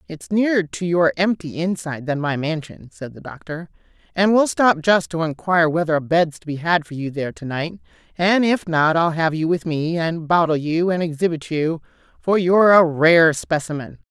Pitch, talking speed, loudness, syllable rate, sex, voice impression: 165 Hz, 205 wpm, -19 LUFS, 5.1 syllables/s, female, slightly masculine, adult-like, slightly clear, slightly refreshing, unique